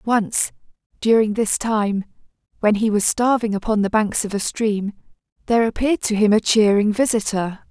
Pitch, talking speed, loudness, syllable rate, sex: 215 Hz, 165 wpm, -19 LUFS, 5.0 syllables/s, female